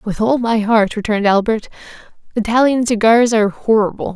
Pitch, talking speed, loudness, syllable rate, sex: 220 Hz, 145 wpm, -15 LUFS, 5.5 syllables/s, female